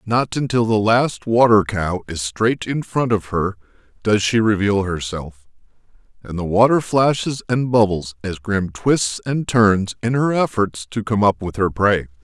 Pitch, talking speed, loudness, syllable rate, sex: 105 Hz, 175 wpm, -18 LUFS, 4.2 syllables/s, male